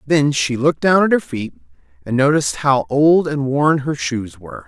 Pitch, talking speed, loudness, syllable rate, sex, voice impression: 135 Hz, 205 wpm, -17 LUFS, 5.0 syllables/s, male, masculine, adult-like, cool, slightly refreshing, sincere